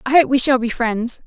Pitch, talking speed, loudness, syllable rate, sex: 250 Hz, 285 wpm, -17 LUFS, 5.2 syllables/s, female